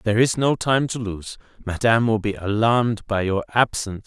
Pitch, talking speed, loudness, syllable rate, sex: 110 Hz, 190 wpm, -21 LUFS, 5.6 syllables/s, male